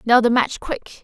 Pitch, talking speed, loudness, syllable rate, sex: 240 Hz, 235 wpm, -19 LUFS, 5.6 syllables/s, female